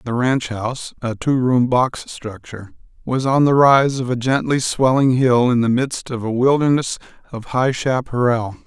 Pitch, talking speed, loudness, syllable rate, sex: 125 Hz, 165 wpm, -17 LUFS, 4.5 syllables/s, male